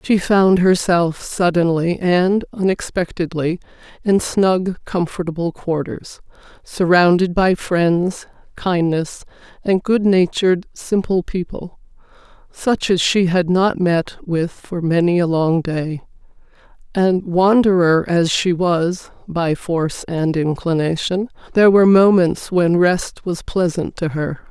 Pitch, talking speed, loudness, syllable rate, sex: 175 Hz, 120 wpm, -17 LUFS, 3.8 syllables/s, female